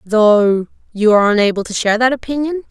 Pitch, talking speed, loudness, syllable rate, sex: 225 Hz, 175 wpm, -14 LUFS, 6.1 syllables/s, female